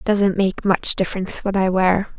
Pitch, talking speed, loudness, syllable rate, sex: 190 Hz, 220 wpm, -19 LUFS, 5.3 syllables/s, female